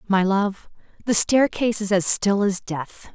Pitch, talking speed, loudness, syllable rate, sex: 200 Hz, 170 wpm, -20 LUFS, 4.2 syllables/s, female